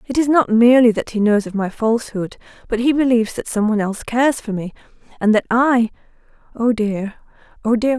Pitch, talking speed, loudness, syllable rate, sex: 230 Hz, 195 wpm, -17 LUFS, 6.0 syllables/s, female